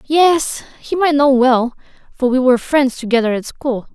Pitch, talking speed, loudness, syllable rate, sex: 265 Hz, 180 wpm, -15 LUFS, 4.6 syllables/s, female